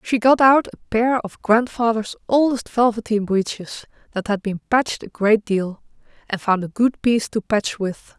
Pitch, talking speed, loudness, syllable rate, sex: 220 Hz, 185 wpm, -20 LUFS, 4.6 syllables/s, female